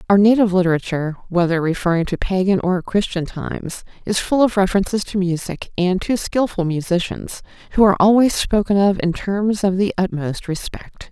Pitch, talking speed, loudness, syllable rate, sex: 190 Hz, 165 wpm, -18 LUFS, 5.4 syllables/s, female